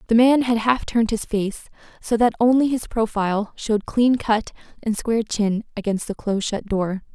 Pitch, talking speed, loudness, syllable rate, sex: 220 Hz, 195 wpm, -21 LUFS, 5.3 syllables/s, female